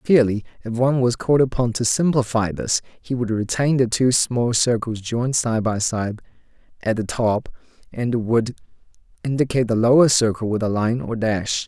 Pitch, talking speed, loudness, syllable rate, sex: 115 Hz, 175 wpm, -20 LUFS, 5.0 syllables/s, male